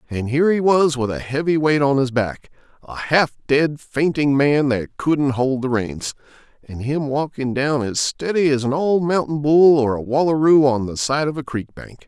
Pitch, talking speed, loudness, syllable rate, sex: 140 Hz, 200 wpm, -19 LUFS, 4.6 syllables/s, male